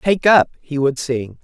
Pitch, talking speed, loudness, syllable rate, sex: 150 Hz, 210 wpm, -17 LUFS, 4.3 syllables/s, female